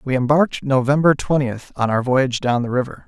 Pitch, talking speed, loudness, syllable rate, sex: 130 Hz, 195 wpm, -18 LUFS, 5.8 syllables/s, male